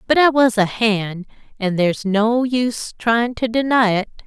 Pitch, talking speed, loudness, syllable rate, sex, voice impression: 225 Hz, 185 wpm, -18 LUFS, 4.4 syllables/s, female, very feminine, slightly young, slightly adult-like, very thin, tensed, slightly powerful, bright, slightly soft, clear, fluent, slightly raspy, cute, very intellectual, very refreshing, sincere, calm, slightly friendly, slightly reassuring, very unique, elegant, slightly wild, very sweet, slightly lively, slightly strict, slightly intense, sharp, light